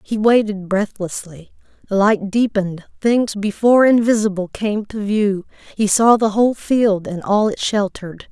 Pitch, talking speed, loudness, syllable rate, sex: 210 Hz, 150 wpm, -17 LUFS, 4.6 syllables/s, female